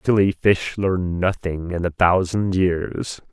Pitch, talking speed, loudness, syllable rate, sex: 90 Hz, 145 wpm, -21 LUFS, 3.5 syllables/s, male